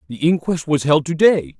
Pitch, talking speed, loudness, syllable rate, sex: 150 Hz, 225 wpm, -17 LUFS, 5.0 syllables/s, male